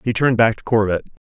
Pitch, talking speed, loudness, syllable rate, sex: 110 Hz, 235 wpm, -18 LUFS, 7.0 syllables/s, male